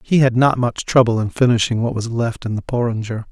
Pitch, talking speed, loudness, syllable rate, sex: 120 Hz, 235 wpm, -18 LUFS, 5.6 syllables/s, male